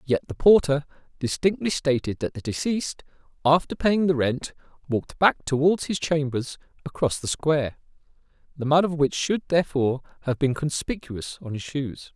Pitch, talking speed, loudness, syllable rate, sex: 150 Hz, 160 wpm, -24 LUFS, 5.2 syllables/s, male